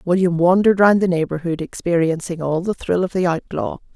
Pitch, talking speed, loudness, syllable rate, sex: 175 Hz, 180 wpm, -18 LUFS, 5.6 syllables/s, female